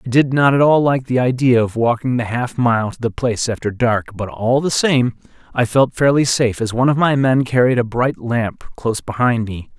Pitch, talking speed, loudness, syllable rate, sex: 125 Hz, 235 wpm, -17 LUFS, 5.2 syllables/s, male